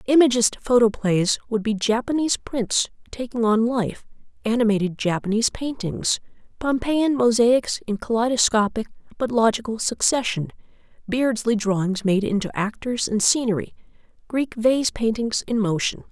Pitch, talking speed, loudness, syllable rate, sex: 230 Hz, 115 wpm, -22 LUFS, 4.8 syllables/s, female